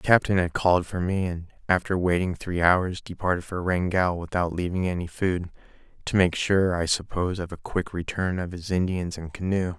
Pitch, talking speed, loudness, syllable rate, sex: 90 Hz, 195 wpm, -25 LUFS, 5.2 syllables/s, male